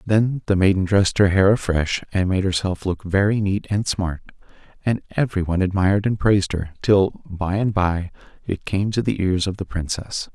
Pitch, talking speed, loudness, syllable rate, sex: 95 Hz, 190 wpm, -21 LUFS, 5.0 syllables/s, male